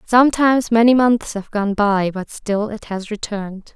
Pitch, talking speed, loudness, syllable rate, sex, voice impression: 215 Hz, 175 wpm, -18 LUFS, 4.7 syllables/s, female, feminine, slightly young, slightly cute, slightly intellectual, calm